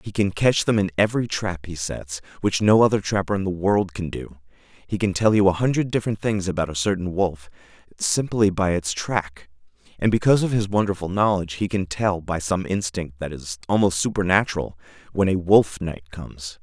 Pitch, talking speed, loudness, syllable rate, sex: 95 Hz, 200 wpm, -22 LUFS, 5.5 syllables/s, male